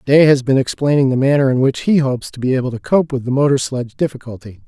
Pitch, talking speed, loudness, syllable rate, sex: 135 Hz, 255 wpm, -16 LUFS, 6.6 syllables/s, male